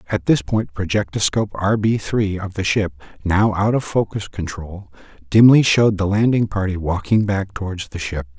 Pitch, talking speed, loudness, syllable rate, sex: 95 Hz, 180 wpm, -19 LUFS, 5.0 syllables/s, male